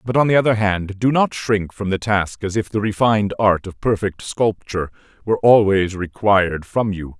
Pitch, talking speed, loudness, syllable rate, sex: 100 Hz, 200 wpm, -18 LUFS, 5.1 syllables/s, male